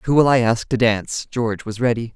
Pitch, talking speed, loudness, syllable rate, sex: 115 Hz, 250 wpm, -19 LUFS, 5.8 syllables/s, female